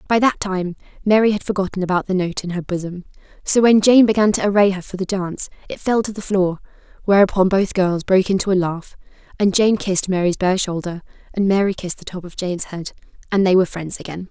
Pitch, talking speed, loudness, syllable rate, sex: 190 Hz, 220 wpm, -18 LUFS, 6.2 syllables/s, female